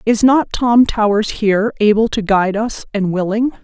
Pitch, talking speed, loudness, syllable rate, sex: 215 Hz, 180 wpm, -15 LUFS, 5.0 syllables/s, female